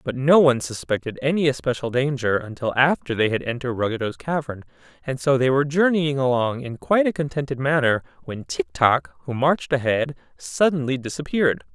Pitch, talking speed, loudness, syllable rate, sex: 135 Hz, 170 wpm, -22 LUFS, 5.8 syllables/s, male